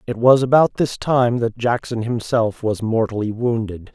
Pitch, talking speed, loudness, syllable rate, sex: 115 Hz, 165 wpm, -19 LUFS, 4.6 syllables/s, male